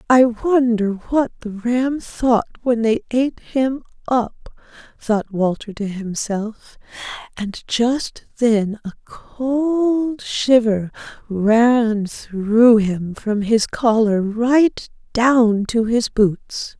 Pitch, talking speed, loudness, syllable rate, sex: 230 Hz, 115 wpm, -18 LUFS, 2.8 syllables/s, female